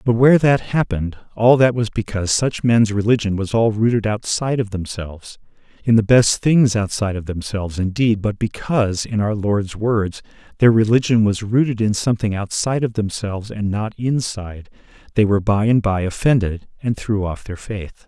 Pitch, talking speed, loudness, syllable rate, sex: 110 Hz, 180 wpm, -18 LUFS, 5.4 syllables/s, male